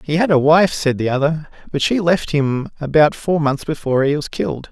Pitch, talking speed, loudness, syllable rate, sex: 150 Hz, 230 wpm, -17 LUFS, 5.4 syllables/s, male